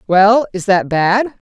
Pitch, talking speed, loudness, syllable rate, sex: 200 Hz, 160 wpm, -14 LUFS, 3.5 syllables/s, female